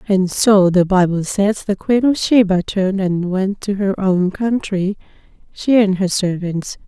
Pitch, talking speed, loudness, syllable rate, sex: 195 Hz, 175 wpm, -16 LUFS, 4.1 syllables/s, female